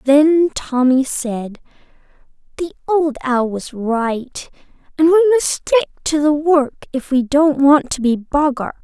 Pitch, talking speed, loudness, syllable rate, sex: 280 Hz, 150 wpm, -16 LUFS, 3.8 syllables/s, female